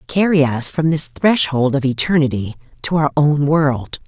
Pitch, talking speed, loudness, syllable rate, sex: 145 Hz, 160 wpm, -16 LUFS, 4.5 syllables/s, female